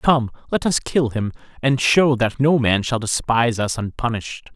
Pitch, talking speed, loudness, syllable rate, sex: 120 Hz, 185 wpm, -19 LUFS, 4.8 syllables/s, male